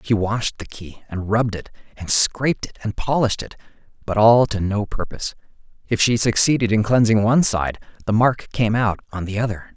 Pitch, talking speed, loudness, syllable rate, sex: 110 Hz, 195 wpm, -20 LUFS, 5.5 syllables/s, male